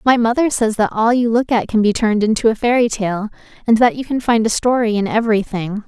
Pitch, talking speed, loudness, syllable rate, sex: 225 Hz, 245 wpm, -16 LUFS, 6.0 syllables/s, female